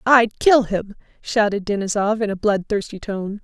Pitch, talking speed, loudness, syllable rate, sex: 210 Hz, 155 wpm, -20 LUFS, 4.6 syllables/s, female